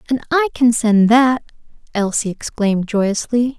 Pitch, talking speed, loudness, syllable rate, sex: 230 Hz, 135 wpm, -16 LUFS, 4.2 syllables/s, female